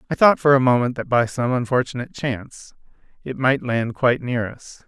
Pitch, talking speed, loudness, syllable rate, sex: 125 Hz, 195 wpm, -20 LUFS, 5.5 syllables/s, male